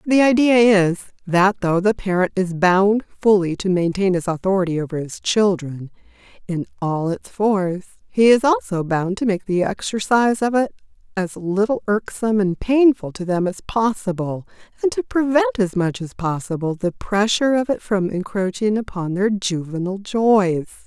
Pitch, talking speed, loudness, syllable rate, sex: 195 Hz, 165 wpm, -19 LUFS, 4.8 syllables/s, female